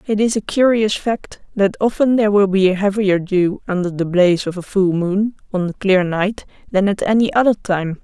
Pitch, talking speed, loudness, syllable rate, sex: 195 Hz, 215 wpm, -17 LUFS, 5.1 syllables/s, female